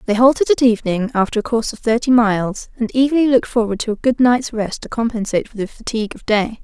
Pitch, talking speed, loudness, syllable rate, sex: 230 Hz, 235 wpm, -17 LUFS, 6.6 syllables/s, female